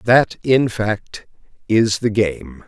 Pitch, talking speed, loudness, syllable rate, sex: 105 Hz, 135 wpm, -18 LUFS, 2.7 syllables/s, male